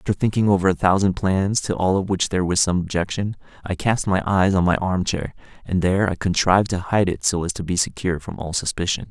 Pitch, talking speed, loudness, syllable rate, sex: 95 Hz, 245 wpm, -21 LUFS, 6.0 syllables/s, male